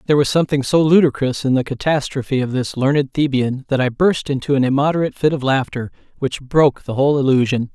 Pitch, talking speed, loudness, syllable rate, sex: 135 Hz, 200 wpm, -17 LUFS, 6.3 syllables/s, male